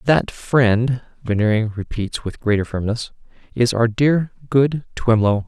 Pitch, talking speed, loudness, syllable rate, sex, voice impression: 115 Hz, 130 wpm, -19 LUFS, 4.1 syllables/s, male, masculine, adult-like, relaxed, weak, slightly dark, slightly muffled, cool, intellectual, sincere, calm, friendly, reassuring, wild, slightly lively, kind, slightly modest